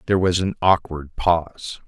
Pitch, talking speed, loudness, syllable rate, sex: 85 Hz, 160 wpm, -20 LUFS, 5.0 syllables/s, male